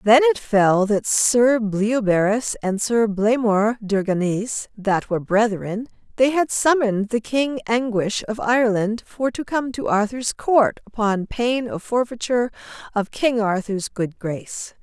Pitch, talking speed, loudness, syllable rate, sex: 220 Hz, 150 wpm, -20 LUFS, 4.2 syllables/s, female